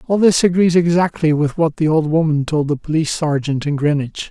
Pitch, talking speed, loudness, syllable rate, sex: 155 Hz, 210 wpm, -16 LUFS, 5.5 syllables/s, male